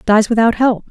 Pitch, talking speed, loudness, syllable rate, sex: 225 Hz, 200 wpm, -13 LUFS, 5.1 syllables/s, female